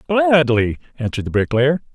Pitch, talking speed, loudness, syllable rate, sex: 145 Hz, 125 wpm, -17 LUFS, 5.3 syllables/s, male